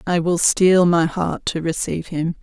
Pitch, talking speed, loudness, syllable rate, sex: 170 Hz, 200 wpm, -18 LUFS, 4.4 syllables/s, female